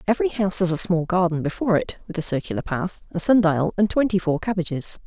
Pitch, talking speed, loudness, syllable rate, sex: 180 Hz, 225 wpm, -22 LUFS, 6.4 syllables/s, female